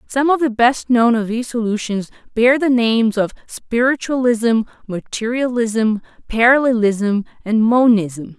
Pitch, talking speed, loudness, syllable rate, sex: 230 Hz, 120 wpm, -17 LUFS, 4.8 syllables/s, female